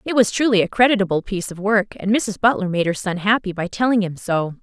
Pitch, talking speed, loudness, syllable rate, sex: 200 Hz, 245 wpm, -19 LUFS, 6.1 syllables/s, female